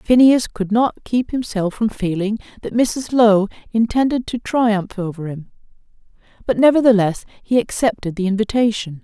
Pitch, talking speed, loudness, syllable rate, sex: 220 Hz, 140 wpm, -18 LUFS, 4.8 syllables/s, female